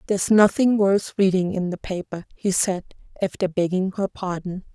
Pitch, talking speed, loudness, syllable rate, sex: 190 Hz, 175 wpm, -22 LUFS, 5.3 syllables/s, female